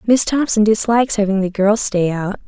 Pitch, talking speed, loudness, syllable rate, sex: 210 Hz, 195 wpm, -16 LUFS, 5.3 syllables/s, female